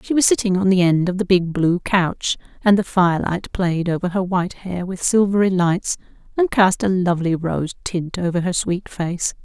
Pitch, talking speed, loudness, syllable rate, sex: 185 Hz, 205 wpm, -19 LUFS, 4.9 syllables/s, female